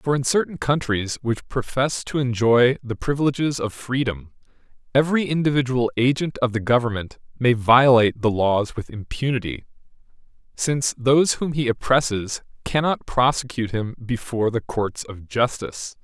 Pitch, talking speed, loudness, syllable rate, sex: 125 Hz, 140 wpm, -21 LUFS, 5.0 syllables/s, male